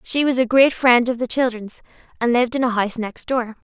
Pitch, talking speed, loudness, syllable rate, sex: 240 Hz, 245 wpm, -19 LUFS, 5.8 syllables/s, female